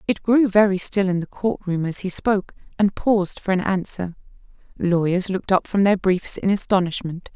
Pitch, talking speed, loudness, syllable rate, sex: 190 Hz, 195 wpm, -21 LUFS, 5.2 syllables/s, female